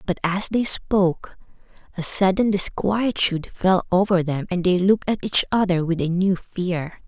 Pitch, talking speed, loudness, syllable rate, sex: 185 Hz, 170 wpm, -21 LUFS, 4.7 syllables/s, female